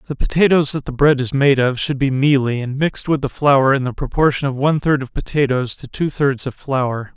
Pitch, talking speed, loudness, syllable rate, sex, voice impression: 135 Hz, 245 wpm, -17 LUFS, 5.5 syllables/s, male, masculine, adult-like, tensed, clear, fluent, cool, intellectual, calm, friendly, slightly reassuring, wild, lively